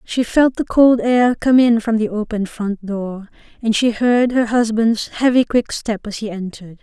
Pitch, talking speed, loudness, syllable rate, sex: 225 Hz, 200 wpm, -17 LUFS, 4.6 syllables/s, female